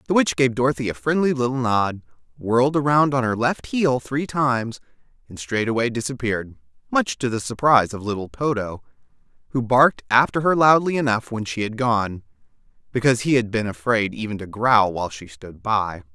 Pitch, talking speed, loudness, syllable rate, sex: 120 Hz, 180 wpm, -21 LUFS, 5.4 syllables/s, male